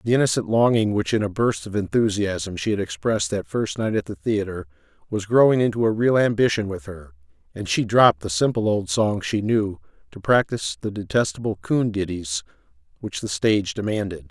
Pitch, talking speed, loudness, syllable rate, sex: 110 Hz, 190 wpm, -22 LUFS, 5.5 syllables/s, male